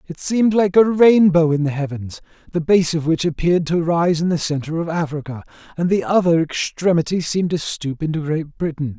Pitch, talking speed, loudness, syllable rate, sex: 165 Hz, 200 wpm, -18 LUFS, 5.5 syllables/s, male